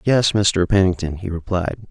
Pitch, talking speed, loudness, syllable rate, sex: 95 Hz, 155 wpm, -19 LUFS, 4.4 syllables/s, male